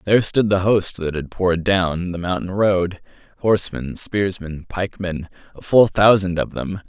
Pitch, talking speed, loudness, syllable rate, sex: 90 Hz, 155 wpm, -19 LUFS, 4.7 syllables/s, male